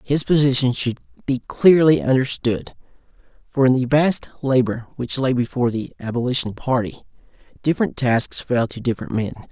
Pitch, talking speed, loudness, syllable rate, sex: 130 Hz, 145 wpm, -20 LUFS, 5.3 syllables/s, male